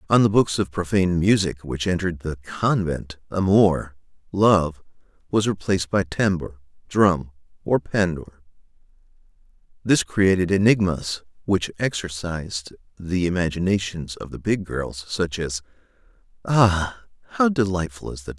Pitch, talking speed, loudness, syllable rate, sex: 90 Hz, 125 wpm, -22 LUFS, 4.8 syllables/s, male